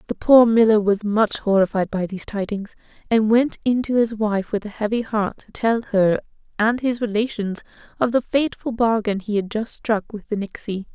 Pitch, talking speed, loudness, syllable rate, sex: 215 Hz, 195 wpm, -20 LUFS, 4.9 syllables/s, female